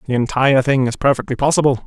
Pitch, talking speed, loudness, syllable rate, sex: 135 Hz, 195 wpm, -16 LUFS, 7.0 syllables/s, male